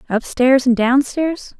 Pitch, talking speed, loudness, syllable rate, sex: 265 Hz, 115 wpm, -16 LUFS, 3.6 syllables/s, female